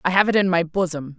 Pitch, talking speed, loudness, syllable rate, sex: 180 Hz, 305 wpm, -20 LUFS, 6.4 syllables/s, female